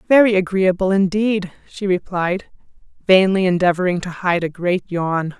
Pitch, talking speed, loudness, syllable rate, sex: 185 Hz, 135 wpm, -18 LUFS, 4.7 syllables/s, female